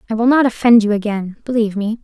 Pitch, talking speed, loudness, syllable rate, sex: 220 Hz, 235 wpm, -15 LUFS, 7.0 syllables/s, female